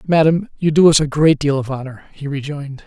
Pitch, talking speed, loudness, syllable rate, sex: 145 Hz, 230 wpm, -16 LUFS, 5.9 syllables/s, male